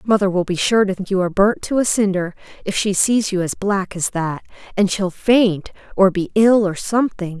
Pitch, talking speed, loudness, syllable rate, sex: 195 Hz, 225 wpm, -18 LUFS, 5.2 syllables/s, female